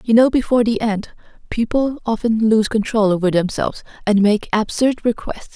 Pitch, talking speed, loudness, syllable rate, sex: 220 Hz, 160 wpm, -18 LUFS, 5.3 syllables/s, female